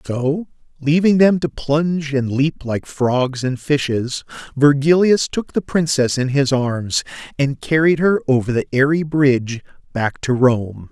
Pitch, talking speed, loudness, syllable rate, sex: 140 Hz, 155 wpm, -18 LUFS, 4.0 syllables/s, male